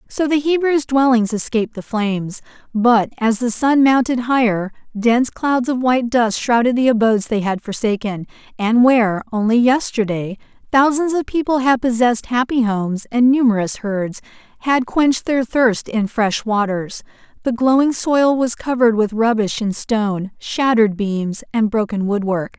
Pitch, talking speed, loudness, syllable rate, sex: 235 Hz, 155 wpm, -17 LUFS, 4.8 syllables/s, female